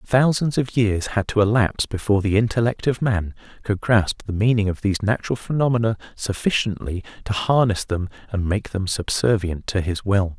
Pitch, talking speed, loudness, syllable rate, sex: 105 Hz, 175 wpm, -21 LUFS, 5.3 syllables/s, male